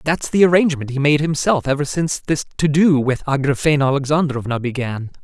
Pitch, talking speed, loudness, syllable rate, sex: 145 Hz, 170 wpm, -18 LUFS, 6.0 syllables/s, male